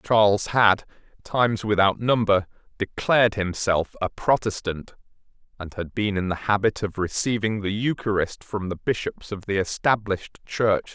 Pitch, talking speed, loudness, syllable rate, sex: 105 Hz, 145 wpm, -23 LUFS, 4.8 syllables/s, male